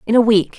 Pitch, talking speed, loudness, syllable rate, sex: 220 Hz, 305 wpm, -14 LUFS, 6.7 syllables/s, female